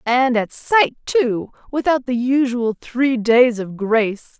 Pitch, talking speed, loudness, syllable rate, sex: 245 Hz, 150 wpm, -18 LUFS, 3.5 syllables/s, female